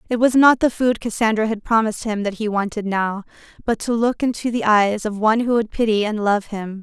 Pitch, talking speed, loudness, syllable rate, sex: 220 Hz, 235 wpm, -19 LUFS, 5.6 syllables/s, female